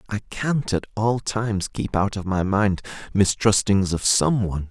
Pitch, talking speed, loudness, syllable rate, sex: 100 Hz, 180 wpm, -22 LUFS, 4.5 syllables/s, male